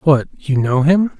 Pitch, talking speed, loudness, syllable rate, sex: 150 Hz, 150 wpm, -16 LUFS, 4.0 syllables/s, male